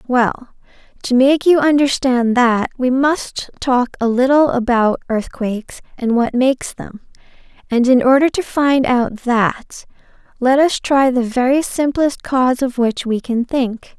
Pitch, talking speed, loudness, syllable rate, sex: 255 Hz, 155 wpm, -16 LUFS, 4.0 syllables/s, female